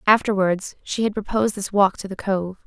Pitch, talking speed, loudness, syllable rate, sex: 200 Hz, 205 wpm, -22 LUFS, 5.3 syllables/s, female